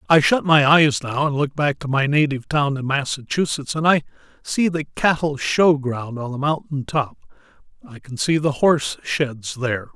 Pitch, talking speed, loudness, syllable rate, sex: 145 Hz, 195 wpm, -20 LUFS, 4.8 syllables/s, male